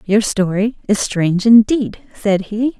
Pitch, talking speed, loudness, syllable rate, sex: 210 Hz, 150 wpm, -15 LUFS, 4.1 syllables/s, female